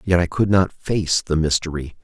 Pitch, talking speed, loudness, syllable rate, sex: 85 Hz, 205 wpm, -20 LUFS, 4.9 syllables/s, male